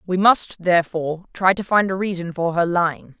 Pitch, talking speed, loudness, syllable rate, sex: 180 Hz, 205 wpm, -20 LUFS, 5.4 syllables/s, female